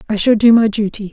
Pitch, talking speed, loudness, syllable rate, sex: 215 Hz, 270 wpm, -13 LUFS, 6.5 syllables/s, female